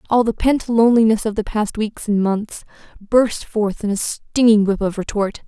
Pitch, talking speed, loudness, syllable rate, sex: 215 Hz, 195 wpm, -18 LUFS, 4.7 syllables/s, female